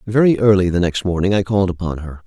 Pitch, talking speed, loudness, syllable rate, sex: 95 Hz, 240 wpm, -17 LUFS, 6.6 syllables/s, male